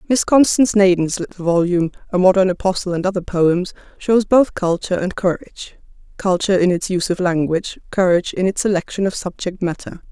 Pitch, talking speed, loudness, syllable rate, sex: 185 Hz, 165 wpm, -17 LUFS, 6.1 syllables/s, female